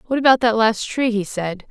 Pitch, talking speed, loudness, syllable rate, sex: 225 Hz, 245 wpm, -18 LUFS, 5.3 syllables/s, female